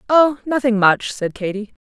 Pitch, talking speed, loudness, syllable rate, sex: 230 Hz, 165 wpm, -18 LUFS, 4.7 syllables/s, female